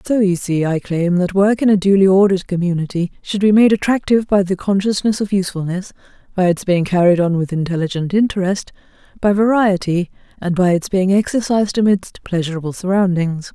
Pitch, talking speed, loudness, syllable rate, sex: 190 Hz, 175 wpm, -16 LUFS, 5.8 syllables/s, female